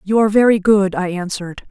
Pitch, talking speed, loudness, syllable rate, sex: 200 Hz, 210 wpm, -15 LUFS, 6.3 syllables/s, female